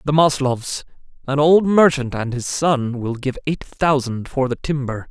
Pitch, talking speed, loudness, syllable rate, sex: 140 Hz, 175 wpm, -19 LUFS, 4.3 syllables/s, male